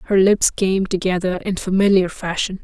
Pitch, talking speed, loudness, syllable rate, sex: 190 Hz, 160 wpm, -18 LUFS, 4.6 syllables/s, female